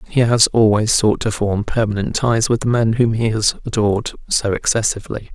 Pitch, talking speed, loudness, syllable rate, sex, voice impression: 110 Hz, 190 wpm, -17 LUFS, 5.3 syllables/s, male, masculine, adult-like, slightly middle-aged, slightly thick, slightly relaxed, slightly weak, slightly dark, slightly soft, slightly muffled, very fluent, slightly raspy, cool, very intellectual, very refreshing, very sincere, slightly calm, slightly mature, slightly friendly, slightly reassuring, unique, elegant, slightly sweet, slightly lively, kind, modest, slightly light